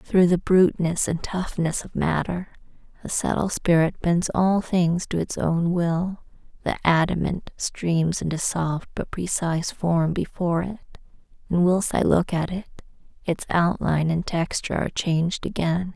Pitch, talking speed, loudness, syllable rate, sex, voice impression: 175 Hz, 150 wpm, -23 LUFS, 4.4 syllables/s, female, very feminine, slightly young, adult-like, thin, very relaxed, very weak, very dark, very soft, very muffled, slightly halting, raspy, cute, intellectual, sincere, very calm, friendly, slightly reassuring, very unique, elegant, wild, sweet, very kind, very modest, light